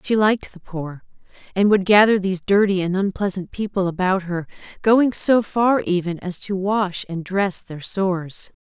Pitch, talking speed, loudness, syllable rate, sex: 190 Hz, 175 wpm, -20 LUFS, 4.6 syllables/s, female